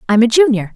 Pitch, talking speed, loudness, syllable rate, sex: 240 Hz, 235 wpm, -12 LUFS, 7.0 syllables/s, female